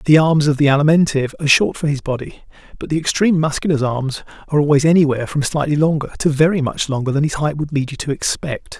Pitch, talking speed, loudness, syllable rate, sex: 145 Hz, 225 wpm, -17 LUFS, 6.7 syllables/s, male